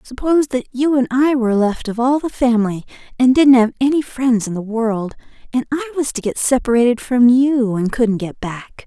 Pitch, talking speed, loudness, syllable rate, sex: 245 Hz, 210 wpm, -16 LUFS, 5.0 syllables/s, female